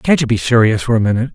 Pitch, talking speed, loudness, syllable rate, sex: 120 Hz, 310 wpm, -14 LUFS, 7.7 syllables/s, male